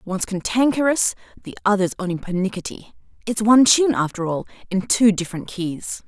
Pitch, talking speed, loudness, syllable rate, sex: 205 Hz, 150 wpm, -20 LUFS, 5.7 syllables/s, female